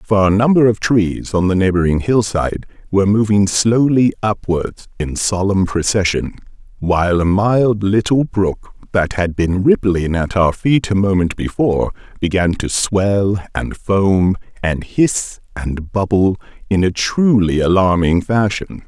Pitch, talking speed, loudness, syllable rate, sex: 100 Hz, 145 wpm, -16 LUFS, 4.1 syllables/s, male